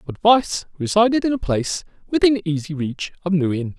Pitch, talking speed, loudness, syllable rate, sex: 180 Hz, 190 wpm, -20 LUFS, 5.3 syllables/s, male